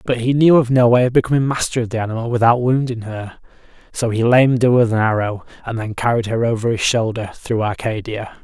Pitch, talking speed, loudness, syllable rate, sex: 115 Hz, 220 wpm, -17 LUFS, 6.0 syllables/s, male